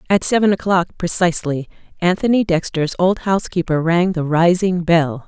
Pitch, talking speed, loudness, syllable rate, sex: 175 Hz, 135 wpm, -17 LUFS, 5.2 syllables/s, female